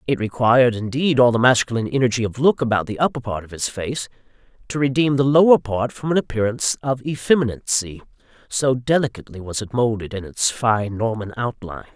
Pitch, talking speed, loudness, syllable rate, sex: 120 Hz, 180 wpm, -20 LUFS, 5.9 syllables/s, male